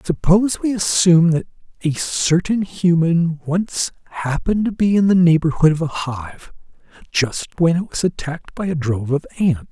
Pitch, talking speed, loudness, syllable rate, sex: 165 Hz, 165 wpm, -18 LUFS, 4.9 syllables/s, male